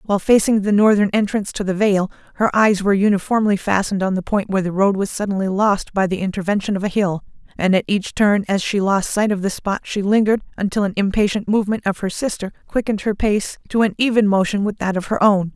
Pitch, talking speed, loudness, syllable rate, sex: 200 Hz, 230 wpm, -18 LUFS, 6.3 syllables/s, female